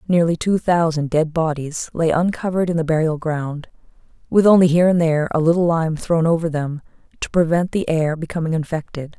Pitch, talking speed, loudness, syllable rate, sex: 165 Hz, 185 wpm, -19 LUFS, 5.6 syllables/s, female